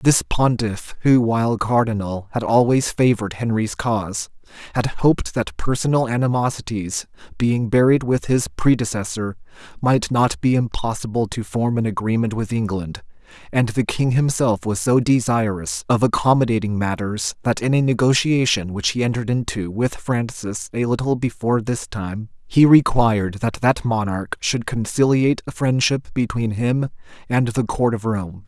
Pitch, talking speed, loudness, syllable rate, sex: 115 Hz, 150 wpm, -20 LUFS, 4.8 syllables/s, male